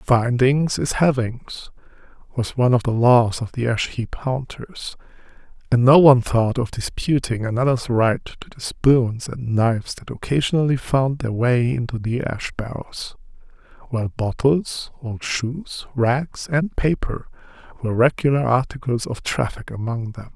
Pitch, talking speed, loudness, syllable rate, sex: 125 Hz, 145 wpm, -20 LUFS, 4.4 syllables/s, male